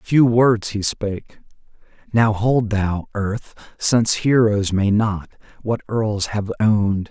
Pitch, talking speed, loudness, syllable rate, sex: 105 Hz, 135 wpm, -19 LUFS, 3.6 syllables/s, male